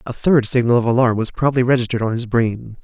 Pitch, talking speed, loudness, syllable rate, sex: 120 Hz, 235 wpm, -17 LUFS, 6.3 syllables/s, male